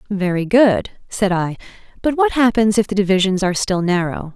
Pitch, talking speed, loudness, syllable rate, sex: 200 Hz, 180 wpm, -17 LUFS, 5.2 syllables/s, female